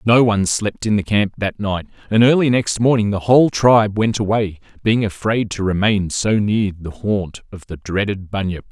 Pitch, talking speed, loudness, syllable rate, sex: 105 Hz, 200 wpm, -17 LUFS, 4.9 syllables/s, male